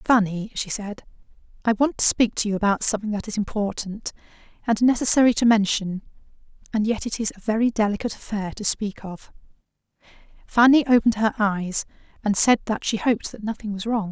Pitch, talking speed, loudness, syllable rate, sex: 215 Hz, 180 wpm, -22 LUFS, 5.9 syllables/s, female